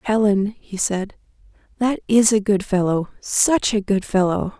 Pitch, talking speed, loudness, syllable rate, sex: 205 Hz, 155 wpm, -19 LUFS, 4.1 syllables/s, female